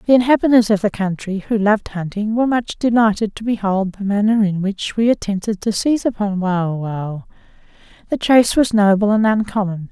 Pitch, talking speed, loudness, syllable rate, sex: 210 Hz, 175 wpm, -17 LUFS, 5.5 syllables/s, female